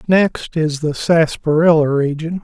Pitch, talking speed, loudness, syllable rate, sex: 160 Hz, 125 wpm, -16 LUFS, 4.0 syllables/s, male